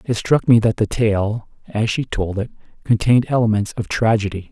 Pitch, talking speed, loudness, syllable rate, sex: 110 Hz, 185 wpm, -18 LUFS, 5.2 syllables/s, male